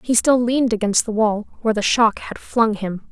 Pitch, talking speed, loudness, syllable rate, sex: 220 Hz, 230 wpm, -19 LUFS, 5.2 syllables/s, female